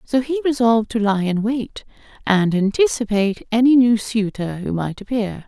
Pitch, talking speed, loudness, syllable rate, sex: 220 Hz, 165 wpm, -19 LUFS, 4.9 syllables/s, female